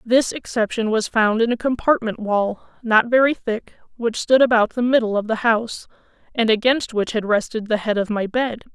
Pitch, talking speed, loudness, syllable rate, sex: 225 Hz, 200 wpm, -20 LUFS, 5.1 syllables/s, female